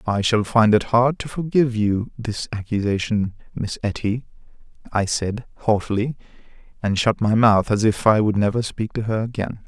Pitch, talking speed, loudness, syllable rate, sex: 110 Hz, 175 wpm, -21 LUFS, 5.0 syllables/s, male